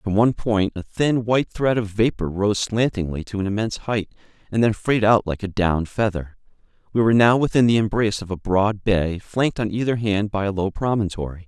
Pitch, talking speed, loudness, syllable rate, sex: 105 Hz, 215 wpm, -21 LUFS, 5.6 syllables/s, male